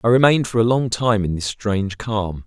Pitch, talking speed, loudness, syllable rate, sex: 110 Hz, 245 wpm, -19 LUFS, 5.5 syllables/s, male